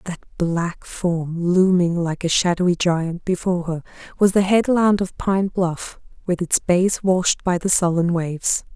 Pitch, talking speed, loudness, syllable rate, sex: 180 Hz, 165 wpm, -20 LUFS, 4.2 syllables/s, female